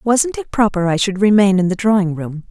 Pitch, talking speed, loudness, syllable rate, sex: 200 Hz, 240 wpm, -16 LUFS, 5.3 syllables/s, female